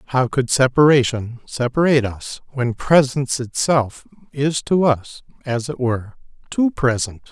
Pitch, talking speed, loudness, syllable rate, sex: 130 Hz, 130 wpm, -19 LUFS, 4.5 syllables/s, male